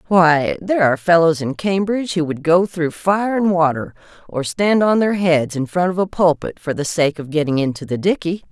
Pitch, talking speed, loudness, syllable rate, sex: 170 Hz, 220 wpm, -17 LUFS, 5.2 syllables/s, female